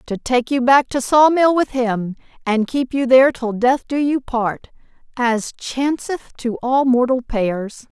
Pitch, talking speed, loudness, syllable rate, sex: 255 Hz, 180 wpm, -18 LUFS, 3.9 syllables/s, female